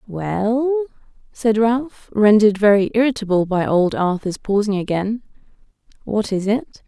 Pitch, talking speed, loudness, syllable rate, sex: 215 Hz, 120 wpm, -18 LUFS, 4.6 syllables/s, female